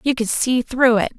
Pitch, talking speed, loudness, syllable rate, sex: 240 Hz, 255 wpm, -18 LUFS, 4.7 syllables/s, female